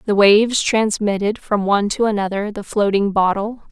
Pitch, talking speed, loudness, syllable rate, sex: 205 Hz, 160 wpm, -17 LUFS, 5.1 syllables/s, female